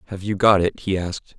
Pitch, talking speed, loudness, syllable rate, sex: 95 Hz, 260 wpm, -20 LUFS, 6.3 syllables/s, male